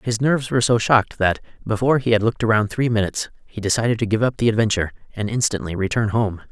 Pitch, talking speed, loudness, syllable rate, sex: 110 Hz, 220 wpm, -20 LUFS, 7.2 syllables/s, male